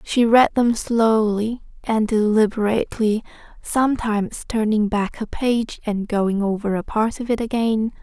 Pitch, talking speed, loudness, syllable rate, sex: 220 Hz, 140 wpm, -20 LUFS, 4.4 syllables/s, female